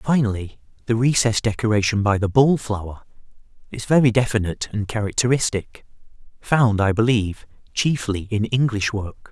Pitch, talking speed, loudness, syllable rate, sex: 110 Hz, 130 wpm, -20 LUFS, 5.2 syllables/s, male